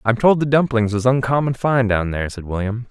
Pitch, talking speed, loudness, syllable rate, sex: 120 Hz, 225 wpm, -18 LUFS, 5.7 syllables/s, male